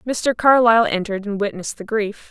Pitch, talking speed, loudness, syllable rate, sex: 215 Hz, 180 wpm, -18 LUFS, 6.0 syllables/s, female